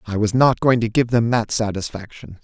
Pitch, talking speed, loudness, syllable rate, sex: 115 Hz, 220 wpm, -19 LUFS, 5.2 syllables/s, male